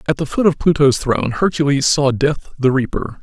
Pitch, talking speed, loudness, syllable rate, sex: 145 Hz, 205 wpm, -16 LUFS, 5.3 syllables/s, male